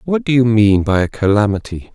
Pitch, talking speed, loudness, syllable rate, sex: 110 Hz, 215 wpm, -14 LUFS, 5.4 syllables/s, male